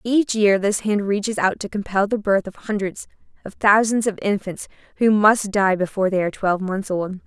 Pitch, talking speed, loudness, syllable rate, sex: 200 Hz, 205 wpm, -20 LUFS, 5.3 syllables/s, female